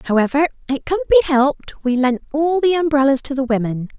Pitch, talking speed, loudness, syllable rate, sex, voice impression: 280 Hz, 195 wpm, -17 LUFS, 5.8 syllables/s, female, feminine, middle-aged, tensed, slightly weak, soft, fluent, intellectual, calm, friendly, reassuring, elegant, slightly modest